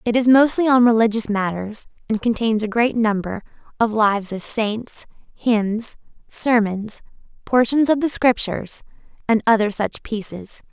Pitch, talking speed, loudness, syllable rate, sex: 225 Hz, 140 wpm, -19 LUFS, 4.4 syllables/s, female